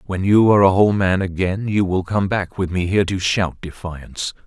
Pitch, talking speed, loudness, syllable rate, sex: 95 Hz, 230 wpm, -18 LUFS, 5.5 syllables/s, male